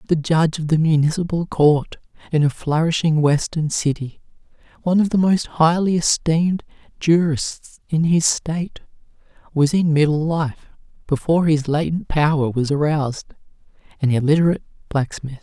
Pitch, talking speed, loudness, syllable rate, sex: 155 Hz, 130 wpm, -19 LUFS, 5.1 syllables/s, male